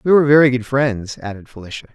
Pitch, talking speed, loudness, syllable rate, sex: 125 Hz, 215 wpm, -15 LUFS, 6.7 syllables/s, male